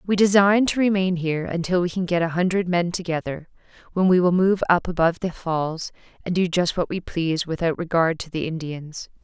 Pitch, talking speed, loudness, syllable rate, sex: 175 Hz, 210 wpm, -22 LUFS, 5.5 syllables/s, female